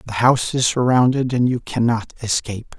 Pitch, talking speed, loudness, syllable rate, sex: 120 Hz, 170 wpm, -18 LUFS, 5.6 syllables/s, male